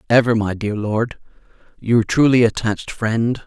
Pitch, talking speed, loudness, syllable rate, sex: 115 Hz, 140 wpm, -18 LUFS, 4.5 syllables/s, male